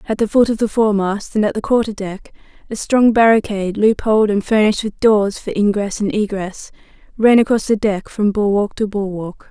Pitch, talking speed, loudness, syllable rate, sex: 210 Hz, 200 wpm, -16 LUFS, 5.4 syllables/s, female